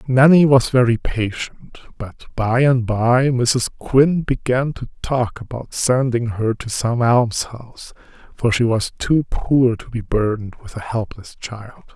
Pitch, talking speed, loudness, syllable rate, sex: 120 Hz, 155 wpm, -18 LUFS, 4.0 syllables/s, male